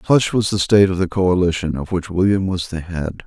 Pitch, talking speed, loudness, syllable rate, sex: 90 Hz, 240 wpm, -18 LUFS, 5.8 syllables/s, male